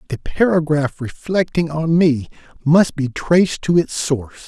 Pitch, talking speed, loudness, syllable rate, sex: 155 Hz, 145 wpm, -17 LUFS, 4.5 syllables/s, male